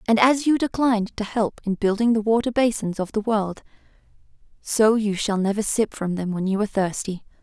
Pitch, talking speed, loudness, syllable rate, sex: 215 Hz, 200 wpm, -22 LUFS, 5.4 syllables/s, female